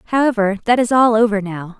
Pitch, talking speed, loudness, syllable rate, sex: 220 Hz, 200 wpm, -15 LUFS, 6.1 syllables/s, female